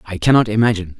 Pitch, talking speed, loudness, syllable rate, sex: 105 Hz, 180 wpm, -15 LUFS, 7.9 syllables/s, male